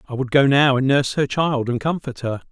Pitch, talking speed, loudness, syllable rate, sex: 130 Hz, 265 wpm, -19 LUFS, 5.6 syllables/s, male